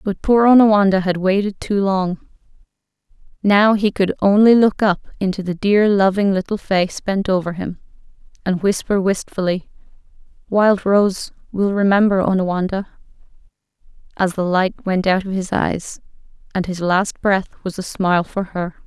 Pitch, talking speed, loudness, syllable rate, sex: 195 Hz, 150 wpm, -17 LUFS, 4.7 syllables/s, female